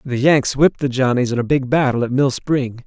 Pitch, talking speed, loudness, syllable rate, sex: 130 Hz, 250 wpm, -17 LUFS, 5.4 syllables/s, male